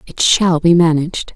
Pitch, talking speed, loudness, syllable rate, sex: 165 Hz, 175 wpm, -13 LUFS, 5.0 syllables/s, female